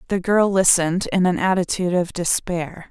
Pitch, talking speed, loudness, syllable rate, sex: 180 Hz, 165 wpm, -19 LUFS, 5.2 syllables/s, female